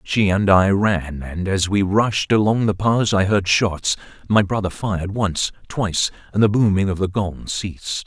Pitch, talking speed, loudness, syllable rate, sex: 100 Hz, 170 wpm, -19 LUFS, 4.4 syllables/s, male